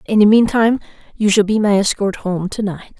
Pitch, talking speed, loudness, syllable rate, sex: 205 Hz, 220 wpm, -16 LUFS, 5.6 syllables/s, female